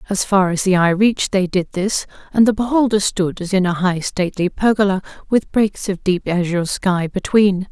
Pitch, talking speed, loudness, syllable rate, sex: 190 Hz, 200 wpm, -17 LUFS, 5.2 syllables/s, female